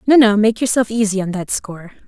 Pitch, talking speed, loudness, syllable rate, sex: 215 Hz, 230 wpm, -16 LUFS, 6.1 syllables/s, female